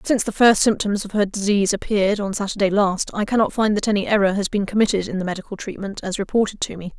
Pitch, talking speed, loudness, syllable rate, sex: 200 Hz, 240 wpm, -20 LUFS, 6.7 syllables/s, female